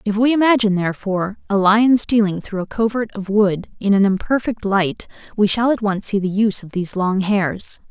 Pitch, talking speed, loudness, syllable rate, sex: 205 Hz, 205 wpm, -18 LUFS, 5.4 syllables/s, female